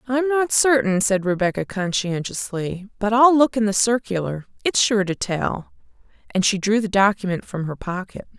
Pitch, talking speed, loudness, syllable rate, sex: 210 Hz, 165 wpm, -20 LUFS, 4.8 syllables/s, female